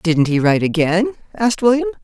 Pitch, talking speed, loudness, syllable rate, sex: 200 Hz, 175 wpm, -16 LUFS, 5.9 syllables/s, female